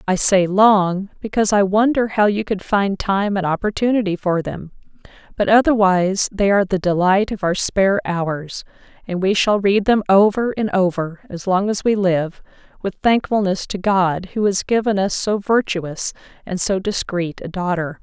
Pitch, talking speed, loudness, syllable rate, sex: 195 Hz, 175 wpm, -18 LUFS, 4.7 syllables/s, female